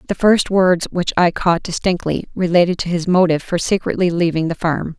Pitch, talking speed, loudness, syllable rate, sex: 175 Hz, 195 wpm, -17 LUFS, 5.4 syllables/s, female